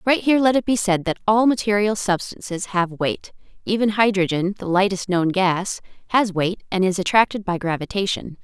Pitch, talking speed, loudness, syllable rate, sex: 195 Hz, 180 wpm, -20 LUFS, 5.3 syllables/s, female